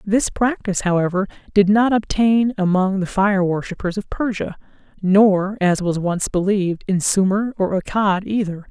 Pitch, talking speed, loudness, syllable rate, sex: 195 Hz, 150 wpm, -19 LUFS, 4.6 syllables/s, female